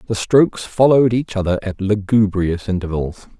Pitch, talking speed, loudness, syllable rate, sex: 105 Hz, 140 wpm, -17 LUFS, 5.2 syllables/s, male